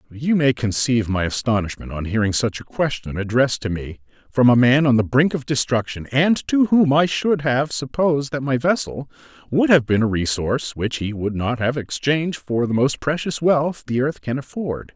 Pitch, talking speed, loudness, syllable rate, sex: 130 Hz, 205 wpm, -20 LUFS, 5.1 syllables/s, male